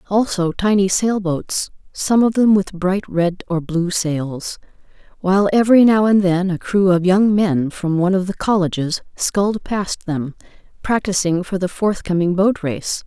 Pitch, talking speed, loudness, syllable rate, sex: 190 Hz, 165 wpm, -17 LUFS, 4.4 syllables/s, female